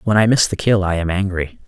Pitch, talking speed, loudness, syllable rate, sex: 95 Hz, 285 wpm, -17 LUFS, 6.0 syllables/s, male